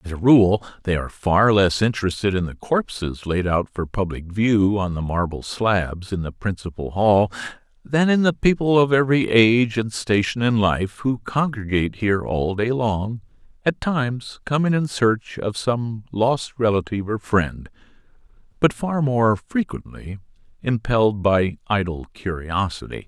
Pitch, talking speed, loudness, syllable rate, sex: 110 Hz, 155 wpm, -21 LUFS, 4.5 syllables/s, male